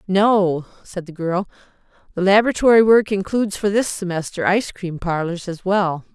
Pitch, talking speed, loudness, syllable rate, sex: 190 Hz, 155 wpm, -19 LUFS, 5.1 syllables/s, female